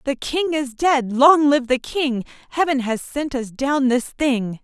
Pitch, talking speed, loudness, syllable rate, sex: 270 Hz, 195 wpm, -19 LUFS, 3.8 syllables/s, female